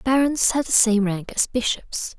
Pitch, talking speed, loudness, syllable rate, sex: 235 Hz, 190 wpm, -20 LUFS, 4.2 syllables/s, female